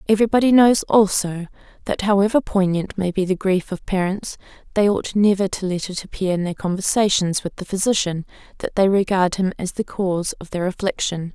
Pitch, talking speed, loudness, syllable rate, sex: 190 Hz, 190 wpm, -20 LUFS, 5.5 syllables/s, female